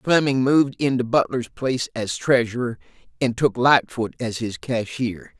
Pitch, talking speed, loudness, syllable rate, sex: 120 Hz, 145 wpm, -22 LUFS, 4.7 syllables/s, male